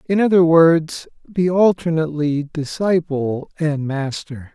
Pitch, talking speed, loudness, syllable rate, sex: 160 Hz, 105 wpm, -18 LUFS, 3.9 syllables/s, male